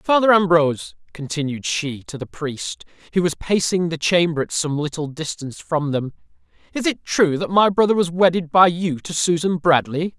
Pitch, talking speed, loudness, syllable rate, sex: 165 Hz, 185 wpm, -19 LUFS, 5.0 syllables/s, male